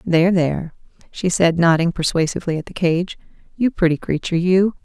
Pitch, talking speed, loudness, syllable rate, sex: 175 Hz, 160 wpm, -19 LUFS, 5.8 syllables/s, female